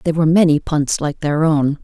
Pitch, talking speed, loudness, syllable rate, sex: 155 Hz, 230 wpm, -16 LUFS, 5.9 syllables/s, female